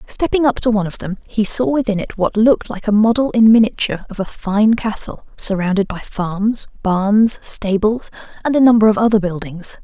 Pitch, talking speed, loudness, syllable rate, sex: 210 Hz, 195 wpm, -16 LUFS, 5.2 syllables/s, female